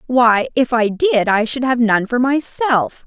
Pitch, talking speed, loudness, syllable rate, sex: 250 Hz, 195 wpm, -16 LUFS, 3.9 syllables/s, female